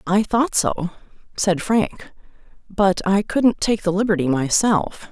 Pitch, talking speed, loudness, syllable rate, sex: 195 Hz, 140 wpm, -19 LUFS, 3.8 syllables/s, female